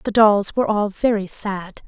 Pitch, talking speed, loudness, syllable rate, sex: 205 Hz, 190 wpm, -19 LUFS, 4.7 syllables/s, female